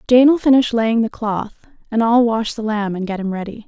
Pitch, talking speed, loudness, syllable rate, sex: 225 Hz, 230 wpm, -17 LUFS, 5.2 syllables/s, female